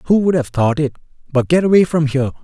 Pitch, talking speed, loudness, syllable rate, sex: 150 Hz, 245 wpm, -16 LUFS, 6.6 syllables/s, male